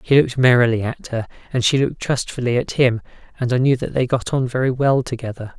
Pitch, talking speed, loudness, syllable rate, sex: 125 Hz, 225 wpm, -19 LUFS, 6.2 syllables/s, male